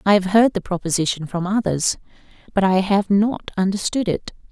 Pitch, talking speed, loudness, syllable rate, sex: 195 Hz, 175 wpm, -20 LUFS, 5.2 syllables/s, female